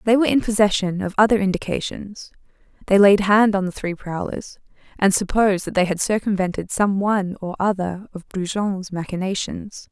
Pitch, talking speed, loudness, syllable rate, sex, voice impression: 195 Hz, 165 wpm, -20 LUFS, 5.4 syllables/s, female, very feminine, adult-like, slightly fluent, sincere, slightly calm, slightly sweet